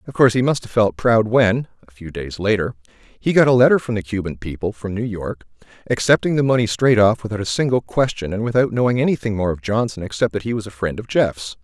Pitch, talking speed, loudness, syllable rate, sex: 110 Hz, 240 wpm, -19 LUFS, 6.1 syllables/s, male